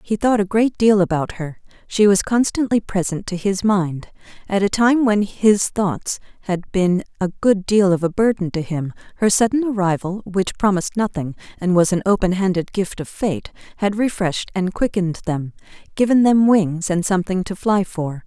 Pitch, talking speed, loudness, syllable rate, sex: 195 Hz, 185 wpm, -19 LUFS, 4.9 syllables/s, female